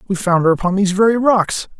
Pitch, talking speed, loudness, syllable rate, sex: 195 Hz, 235 wpm, -15 LUFS, 6.5 syllables/s, male